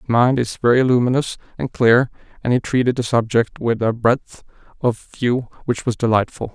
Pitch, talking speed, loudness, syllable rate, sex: 120 Hz, 185 wpm, -19 LUFS, 5.0 syllables/s, male